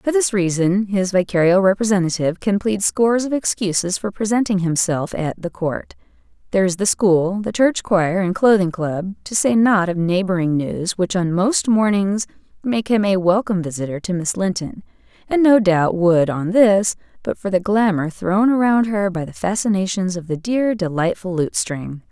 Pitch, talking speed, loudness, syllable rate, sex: 195 Hz, 180 wpm, -18 LUFS, 4.9 syllables/s, female